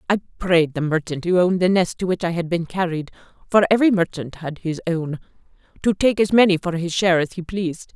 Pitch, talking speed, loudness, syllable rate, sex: 175 Hz, 225 wpm, -20 LUFS, 5.3 syllables/s, female